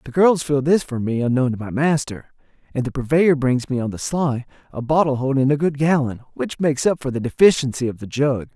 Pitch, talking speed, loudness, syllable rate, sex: 135 Hz, 230 wpm, -20 LUFS, 5.7 syllables/s, male